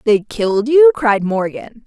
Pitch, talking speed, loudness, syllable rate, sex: 230 Hz, 160 wpm, -14 LUFS, 4.1 syllables/s, female